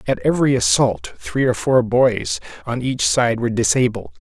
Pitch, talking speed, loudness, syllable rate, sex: 125 Hz, 170 wpm, -18 LUFS, 4.8 syllables/s, male